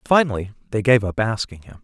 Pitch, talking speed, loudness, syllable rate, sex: 110 Hz, 195 wpm, -21 LUFS, 6.0 syllables/s, male